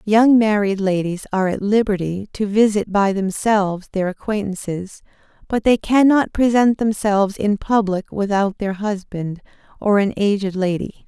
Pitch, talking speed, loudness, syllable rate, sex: 205 Hz, 140 wpm, -18 LUFS, 4.7 syllables/s, female